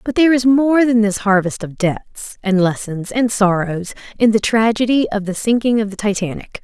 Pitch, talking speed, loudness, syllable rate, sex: 215 Hz, 200 wpm, -16 LUFS, 5.0 syllables/s, female